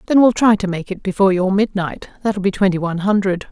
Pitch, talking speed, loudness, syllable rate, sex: 195 Hz, 220 wpm, -17 LUFS, 6.4 syllables/s, female